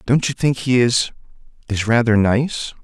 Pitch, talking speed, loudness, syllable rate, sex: 120 Hz, 150 wpm, -18 LUFS, 4.3 syllables/s, male